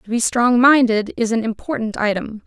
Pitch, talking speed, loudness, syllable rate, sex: 230 Hz, 195 wpm, -17 LUFS, 5.0 syllables/s, female